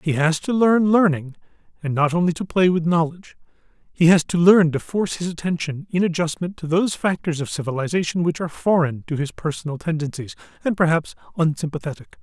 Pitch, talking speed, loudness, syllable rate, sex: 165 Hz, 180 wpm, -21 LUFS, 6.0 syllables/s, male